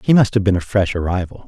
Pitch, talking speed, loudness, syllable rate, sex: 100 Hz, 285 wpm, -17 LUFS, 6.6 syllables/s, male